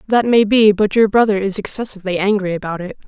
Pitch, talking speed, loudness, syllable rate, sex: 205 Hz, 215 wpm, -15 LUFS, 6.3 syllables/s, female